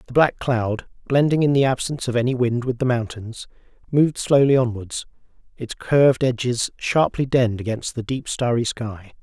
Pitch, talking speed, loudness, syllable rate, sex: 125 Hz, 170 wpm, -21 LUFS, 5.1 syllables/s, male